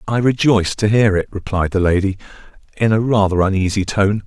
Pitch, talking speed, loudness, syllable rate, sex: 100 Hz, 185 wpm, -16 LUFS, 5.7 syllables/s, male